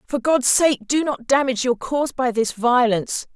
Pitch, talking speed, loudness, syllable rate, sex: 255 Hz, 195 wpm, -19 LUFS, 5.1 syllables/s, female